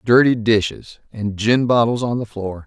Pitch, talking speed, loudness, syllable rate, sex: 110 Hz, 180 wpm, -18 LUFS, 4.5 syllables/s, male